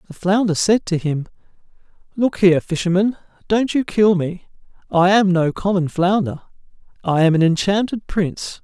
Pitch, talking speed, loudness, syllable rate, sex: 185 Hz, 155 wpm, -18 LUFS, 5.0 syllables/s, male